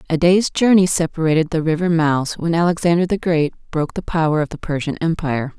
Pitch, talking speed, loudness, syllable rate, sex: 165 Hz, 195 wpm, -18 LUFS, 6.0 syllables/s, female